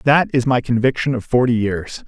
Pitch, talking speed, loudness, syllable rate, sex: 120 Hz, 200 wpm, -18 LUFS, 5.2 syllables/s, male